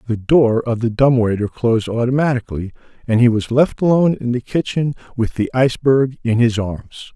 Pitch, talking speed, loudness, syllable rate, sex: 120 Hz, 185 wpm, -17 LUFS, 5.4 syllables/s, male